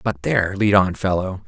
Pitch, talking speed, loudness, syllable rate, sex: 100 Hz, 205 wpm, -19 LUFS, 5.2 syllables/s, male